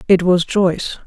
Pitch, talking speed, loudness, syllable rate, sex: 180 Hz, 170 wpm, -16 LUFS, 4.8 syllables/s, female